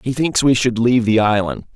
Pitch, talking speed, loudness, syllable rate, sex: 115 Hz, 240 wpm, -16 LUFS, 5.6 syllables/s, male